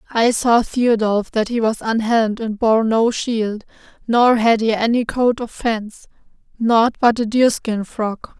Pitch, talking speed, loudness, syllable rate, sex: 225 Hz, 170 wpm, -17 LUFS, 4.1 syllables/s, female